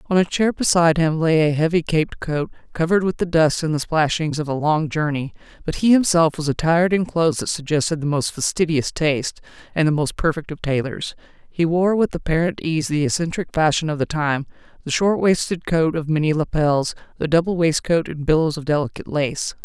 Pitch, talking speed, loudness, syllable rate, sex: 160 Hz, 200 wpm, -20 LUFS, 5.6 syllables/s, female